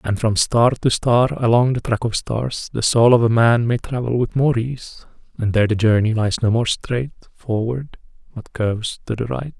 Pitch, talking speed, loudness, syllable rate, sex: 120 Hz, 215 wpm, -18 LUFS, 4.8 syllables/s, male